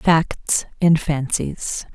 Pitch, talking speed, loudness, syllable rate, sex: 155 Hz, 95 wpm, -20 LUFS, 2.3 syllables/s, female